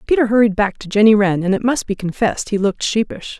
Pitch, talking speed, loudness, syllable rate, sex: 215 Hz, 250 wpm, -16 LUFS, 6.5 syllables/s, female